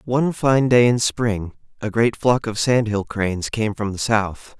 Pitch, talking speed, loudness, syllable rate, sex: 110 Hz, 210 wpm, -20 LUFS, 4.3 syllables/s, male